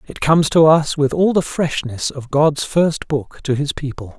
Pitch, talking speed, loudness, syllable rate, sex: 150 Hz, 215 wpm, -17 LUFS, 4.5 syllables/s, male